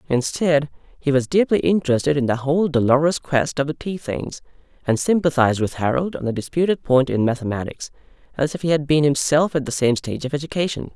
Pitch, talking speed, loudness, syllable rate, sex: 145 Hz, 195 wpm, -20 LUFS, 6.1 syllables/s, male